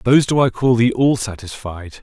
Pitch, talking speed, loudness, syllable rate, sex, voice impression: 120 Hz, 205 wpm, -16 LUFS, 5.2 syllables/s, male, very masculine, adult-like, cool, sincere